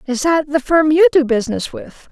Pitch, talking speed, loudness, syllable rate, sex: 295 Hz, 225 wpm, -15 LUFS, 5.2 syllables/s, female